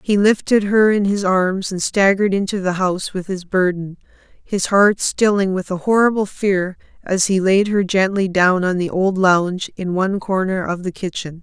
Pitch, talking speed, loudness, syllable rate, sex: 190 Hz, 195 wpm, -17 LUFS, 4.8 syllables/s, female